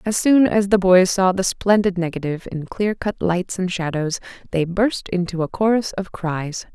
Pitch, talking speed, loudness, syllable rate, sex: 185 Hz, 195 wpm, -20 LUFS, 4.7 syllables/s, female